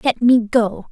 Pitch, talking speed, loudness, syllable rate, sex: 230 Hz, 195 wpm, -16 LUFS, 3.9 syllables/s, female